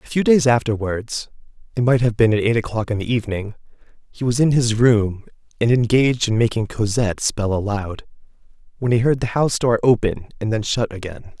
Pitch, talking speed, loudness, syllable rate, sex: 115 Hz, 185 wpm, -19 LUFS, 5.8 syllables/s, male